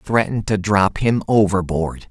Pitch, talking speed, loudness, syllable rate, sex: 100 Hz, 145 wpm, -18 LUFS, 4.1 syllables/s, male